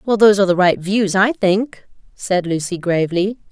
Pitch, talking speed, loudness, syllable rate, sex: 195 Hz, 190 wpm, -16 LUFS, 5.3 syllables/s, female